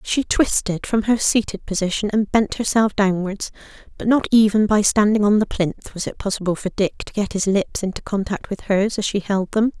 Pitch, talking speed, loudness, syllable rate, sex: 205 Hz, 215 wpm, -20 LUFS, 5.1 syllables/s, female